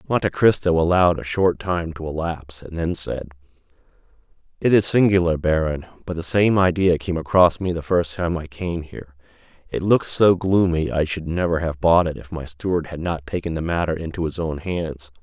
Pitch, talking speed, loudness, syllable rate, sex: 85 Hz, 195 wpm, -21 LUFS, 5.3 syllables/s, male